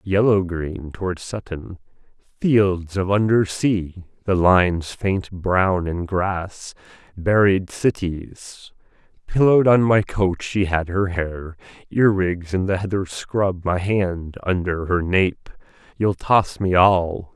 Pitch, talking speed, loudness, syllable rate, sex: 95 Hz, 125 wpm, -20 LUFS, 3.4 syllables/s, male